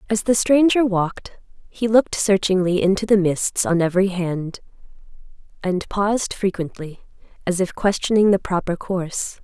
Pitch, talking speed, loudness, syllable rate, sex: 195 Hz, 140 wpm, -20 LUFS, 4.9 syllables/s, female